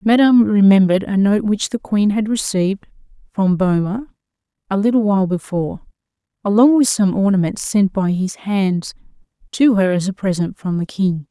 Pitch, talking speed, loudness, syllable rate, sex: 200 Hz, 165 wpm, -17 LUFS, 5.2 syllables/s, female